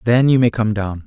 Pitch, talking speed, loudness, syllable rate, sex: 110 Hz, 285 wpm, -16 LUFS, 5.4 syllables/s, male